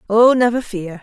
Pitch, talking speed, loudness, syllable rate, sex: 220 Hz, 175 wpm, -15 LUFS, 4.7 syllables/s, female